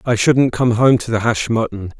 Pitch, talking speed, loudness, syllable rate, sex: 115 Hz, 240 wpm, -16 LUFS, 5.0 syllables/s, male